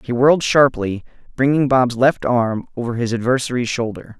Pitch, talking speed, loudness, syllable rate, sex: 125 Hz, 160 wpm, -18 LUFS, 5.2 syllables/s, male